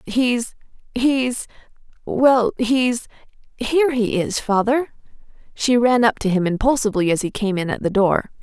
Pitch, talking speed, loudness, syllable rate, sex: 230 Hz, 135 wpm, -19 LUFS, 4.5 syllables/s, female